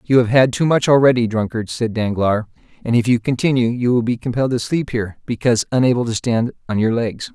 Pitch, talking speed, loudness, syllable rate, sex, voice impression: 120 Hz, 220 wpm, -18 LUFS, 6.1 syllables/s, male, very masculine, slightly middle-aged, thick, slightly tensed, slightly powerful, slightly bright, slightly soft, clear, fluent, slightly raspy, cool, intellectual, slightly refreshing, sincere, very calm, mature, very friendly, very reassuring, unique, elegant, slightly wild, sweet, lively, very kind, slightly modest